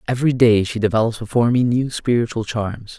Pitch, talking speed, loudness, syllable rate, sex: 115 Hz, 180 wpm, -18 LUFS, 6.0 syllables/s, male